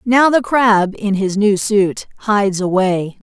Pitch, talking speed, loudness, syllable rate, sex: 205 Hz, 165 wpm, -15 LUFS, 3.8 syllables/s, female